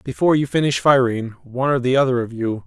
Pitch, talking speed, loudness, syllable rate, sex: 125 Hz, 225 wpm, -18 LUFS, 6.5 syllables/s, male